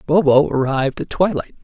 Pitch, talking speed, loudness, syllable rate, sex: 145 Hz, 145 wpm, -17 LUFS, 5.6 syllables/s, male